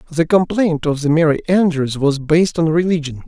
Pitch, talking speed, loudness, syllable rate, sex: 160 Hz, 185 wpm, -16 LUFS, 5.4 syllables/s, male